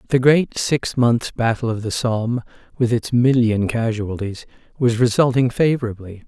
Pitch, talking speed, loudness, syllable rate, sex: 120 Hz, 145 wpm, -19 LUFS, 4.7 syllables/s, male